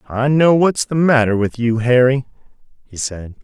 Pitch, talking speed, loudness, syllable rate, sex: 125 Hz, 175 wpm, -16 LUFS, 4.5 syllables/s, male